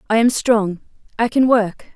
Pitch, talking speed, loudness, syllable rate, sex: 220 Hz, 185 wpm, -17 LUFS, 4.7 syllables/s, female